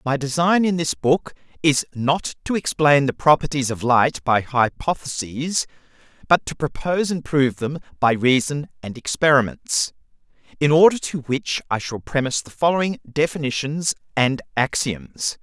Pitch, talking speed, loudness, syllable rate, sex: 140 Hz, 145 wpm, -20 LUFS, 4.7 syllables/s, male